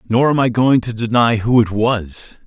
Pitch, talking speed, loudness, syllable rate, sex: 115 Hz, 220 wpm, -15 LUFS, 4.8 syllables/s, male